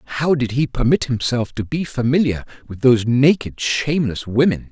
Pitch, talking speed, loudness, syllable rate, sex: 130 Hz, 165 wpm, -18 LUFS, 5.4 syllables/s, male